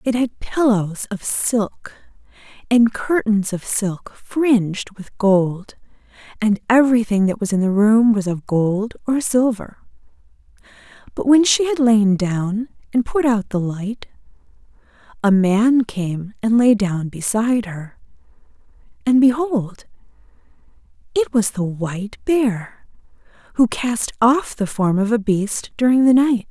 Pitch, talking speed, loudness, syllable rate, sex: 220 Hz, 140 wpm, -18 LUFS, 3.9 syllables/s, female